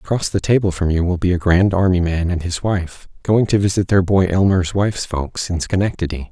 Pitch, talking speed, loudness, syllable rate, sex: 90 Hz, 230 wpm, -18 LUFS, 5.4 syllables/s, male